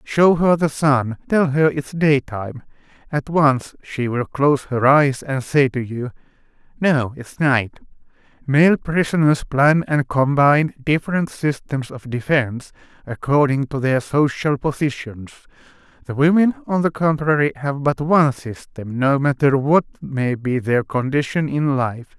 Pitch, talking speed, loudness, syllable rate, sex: 140 Hz, 145 wpm, -18 LUFS, 4.2 syllables/s, male